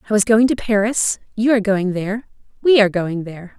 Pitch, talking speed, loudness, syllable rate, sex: 210 Hz, 185 wpm, -17 LUFS, 6.4 syllables/s, female